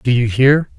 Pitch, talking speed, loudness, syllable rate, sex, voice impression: 130 Hz, 230 wpm, -14 LUFS, 4.4 syllables/s, male, masculine, very adult-like, slightly middle-aged, very thick, relaxed, weak, slightly dark, hard, slightly muffled, fluent, very cool, very intellectual, very sincere, very calm, mature, friendly, reassuring, very elegant, very sweet, very kind, slightly modest